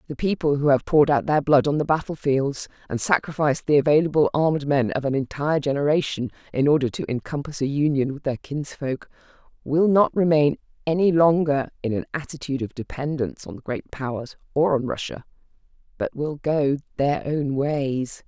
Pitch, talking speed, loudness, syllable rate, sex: 145 Hz, 175 wpm, -23 LUFS, 5.5 syllables/s, female